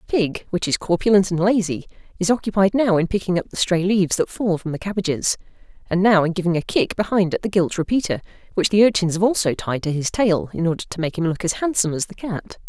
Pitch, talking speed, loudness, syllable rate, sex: 185 Hz, 235 wpm, -20 LUFS, 6.3 syllables/s, female